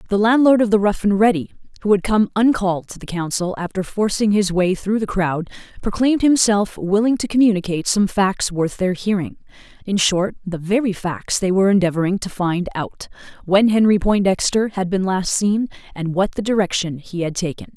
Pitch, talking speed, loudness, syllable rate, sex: 195 Hz, 185 wpm, -18 LUFS, 5.3 syllables/s, female